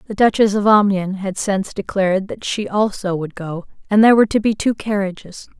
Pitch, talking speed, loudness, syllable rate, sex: 200 Hz, 205 wpm, -17 LUFS, 5.7 syllables/s, female